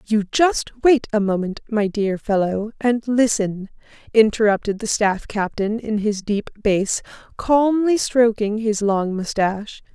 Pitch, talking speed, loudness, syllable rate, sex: 215 Hz, 140 wpm, -20 LUFS, 4.0 syllables/s, female